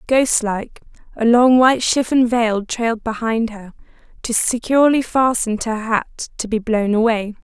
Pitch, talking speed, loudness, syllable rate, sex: 230 Hz, 160 wpm, -17 LUFS, 4.8 syllables/s, female